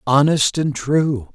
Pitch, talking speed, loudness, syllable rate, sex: 140 Hz, 135 wpm, -18 LUFS, 3.4 syllables/s, male